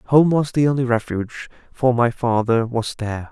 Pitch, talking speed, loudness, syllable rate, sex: 125 Hz, 180 wpm, -19 LUFS, 5.0 syllables/s, male